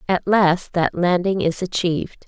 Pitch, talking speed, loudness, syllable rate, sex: 180 Hz, 160 wpm, -19 LUFS, 4.3 syllables/s, female